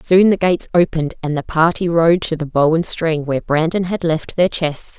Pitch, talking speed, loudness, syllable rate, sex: 165 Hz, 230 wpm, -17 LUFS, 5.2 syllables/s, female